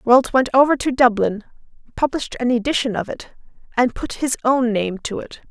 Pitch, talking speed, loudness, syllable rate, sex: 245 Hz, 185 wpm, -19 LUFS, 5.4 syllables/s, female